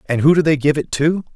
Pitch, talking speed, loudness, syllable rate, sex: 145 Hz, 310 wpm, -16 LUFS, 6.0 syllables/s, male